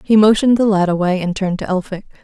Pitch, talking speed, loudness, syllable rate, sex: 195 Hz, 240 wpm, -15 LUFS, 7.0 syllables/s, female